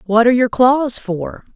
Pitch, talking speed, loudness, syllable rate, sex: 235 Hz, 195 wpm, -15 LUFS, 4.5 syllables/s, female